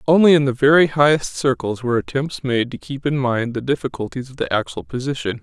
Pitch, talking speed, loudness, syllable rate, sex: 130 Hz, 210 wpm, -19 LUFS, 5.9 syllables/s, male